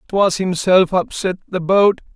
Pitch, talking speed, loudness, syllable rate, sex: 185 Hz, 140 wpm, -16 LUFS, 3.9 syllables/s, male